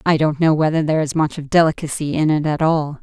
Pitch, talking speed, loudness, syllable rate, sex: 155 Hz, 260 wpm, -18 LUFS, 6.2 syllables/s, female